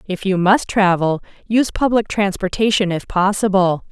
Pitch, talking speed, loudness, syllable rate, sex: 195 Hz, 140 wpm, -17 LUFS, 4.9 syllables/s, female